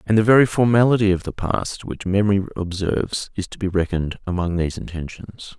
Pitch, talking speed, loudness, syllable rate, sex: 95 Hz, 185 wpm, -20 LUFS, 5.9 syllables/s, male